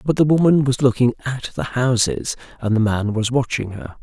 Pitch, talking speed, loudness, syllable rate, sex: 120 Hz, 210 wpm, -19 LUFS, 5.2 syllables/s, male